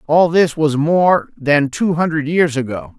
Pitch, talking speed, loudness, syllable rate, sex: 155 Hz, 180 wpm, -15 LUFS, 4.0 syllables/s, male